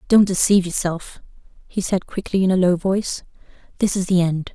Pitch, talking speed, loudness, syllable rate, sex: 185 Hz, 185 wpm, -20 LUFS, 5.7 syllables/s, female